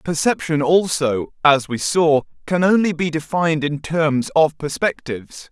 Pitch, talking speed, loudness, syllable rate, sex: 155 Hz, 140 wpm, -18 LUFS, 4.3 syllables/s, male